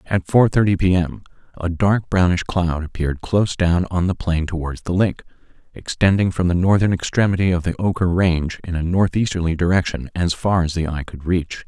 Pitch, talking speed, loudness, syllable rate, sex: 90 Hz, 195 wpm, -19 LUFS, 5.4 syllables/s, male